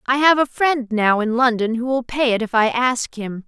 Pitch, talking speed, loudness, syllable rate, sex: 245 Hz, 260 wpm, -18 LUFS, 4.8 syllables/s, female